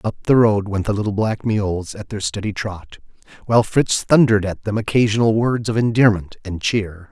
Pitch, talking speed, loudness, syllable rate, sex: 105 Hz, 195 wpm, -18 LUFS, 5.1 syllables/s, male